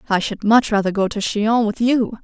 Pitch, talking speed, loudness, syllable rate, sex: 215 Hz, 240 wpm, -18 LUFS, 5.5 syllables/s, female